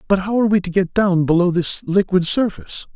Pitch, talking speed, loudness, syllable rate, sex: 190 Hz, 225 wpm, -17 LUFS, 5.8 syllables/s, male